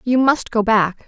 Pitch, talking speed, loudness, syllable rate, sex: 230 Hz, 225 wpm, -17 LUFS, 4.1 syllables/s, female